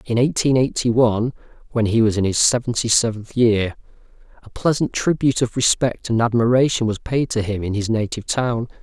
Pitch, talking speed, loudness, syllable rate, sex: 115 Hz, 185 wpm, -19 LUFS, 5.5 syllables/s, male